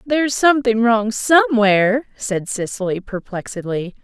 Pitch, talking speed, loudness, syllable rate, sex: 225 Hz, 105 wpm, -17 LUFS, 4.8 syllables/s, female